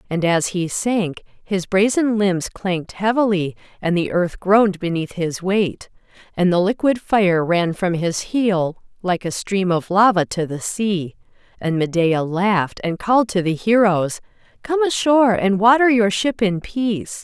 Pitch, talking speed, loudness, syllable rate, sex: 195 Hz, 165 wpm, -19 LUFS, 4.2 syllables/s, female